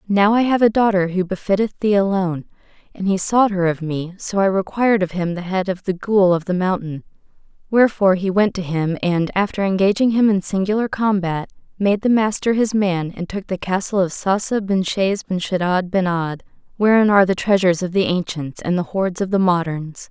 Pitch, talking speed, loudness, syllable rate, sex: 190 Hz, 210 wpm, -19 LUFS, 5.4 syllables/s, female